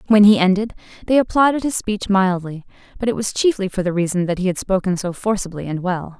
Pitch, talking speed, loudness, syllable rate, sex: 195 Hz, 225 wpm, -19 LUFS, 6.0 syllables/s, female